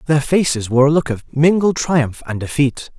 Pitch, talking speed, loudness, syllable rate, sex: 145 Hz, 200 wpm, -16 LUFS, 4.9 syllables/s, male